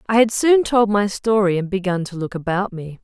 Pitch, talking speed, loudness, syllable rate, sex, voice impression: 200 Hz, 240 wpm, -19 LUFS, 5.3 syllables/s, female, feminine, adult-like, relaxed, slightly powerful, soft, slightly muffled, intellectual, reassuring, elegant, lively, slightly sharp